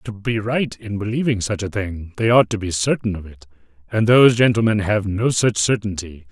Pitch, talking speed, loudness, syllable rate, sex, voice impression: 105 Hz, 210 wpm, -19 LUFS, 5.3 syllables/s, male, masculine, middle-aged, tensed, slightly powerful, slightly hard, cool, calm, mature, wild, slightly lively, slightly strict